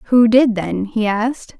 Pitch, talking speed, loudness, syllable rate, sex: 225 Hz, 190 wpm, -16 LUFS, 3.9 syllables/s, female